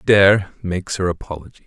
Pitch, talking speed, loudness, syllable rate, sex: 95 Hz, 145 wpm, -18 LUFS, 6.0 syllables/s, male